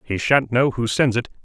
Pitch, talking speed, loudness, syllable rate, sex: 120 Hz, 250 wpm, -19 LUFS, 5.0 syllables/s, male